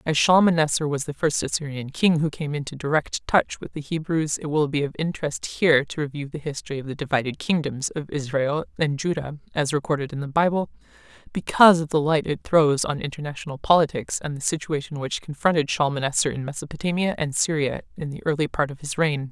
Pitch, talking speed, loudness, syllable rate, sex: 150 Hz, 200 wpm, -23 LUFS, 6.0 syllables/s, female